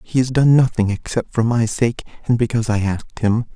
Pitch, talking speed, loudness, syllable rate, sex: 115 Hz, 220 wpm, -18 LUFS, 5.8 syllables/s, male